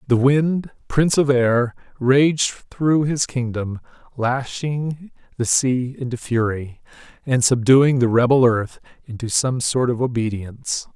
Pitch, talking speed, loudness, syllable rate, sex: 130 Hz, 130 wpm, -19 LUFS, 3.9 syllables/s, male